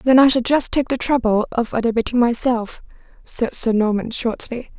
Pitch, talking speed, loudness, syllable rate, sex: 240 Hz, 175 wpm, -18 LUFS, 4.7 syllables/s, female